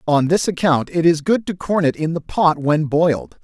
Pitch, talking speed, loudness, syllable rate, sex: 160 Hz, 245 wpm, -18 LUFS, 4.9 syllables/s, male